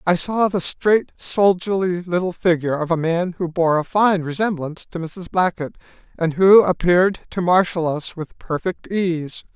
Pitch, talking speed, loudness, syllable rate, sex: 175 Hz, 170 wpm, -19 LUFS, 4.6 syllables/s, male